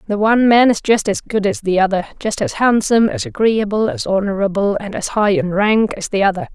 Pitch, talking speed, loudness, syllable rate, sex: 205 Hz, 230 wpm, -16 LUFS, 5.7 syllables/s, female